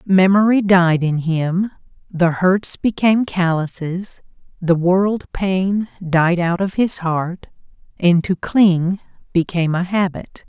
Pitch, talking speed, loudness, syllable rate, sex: 180 Hz, 125 wpm, -17 LUFS, 3.6 syllables/s, female